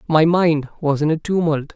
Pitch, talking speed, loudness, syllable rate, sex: 155 Hz, 205 wpm, -18 LUFS, 4.8 syllables/s, male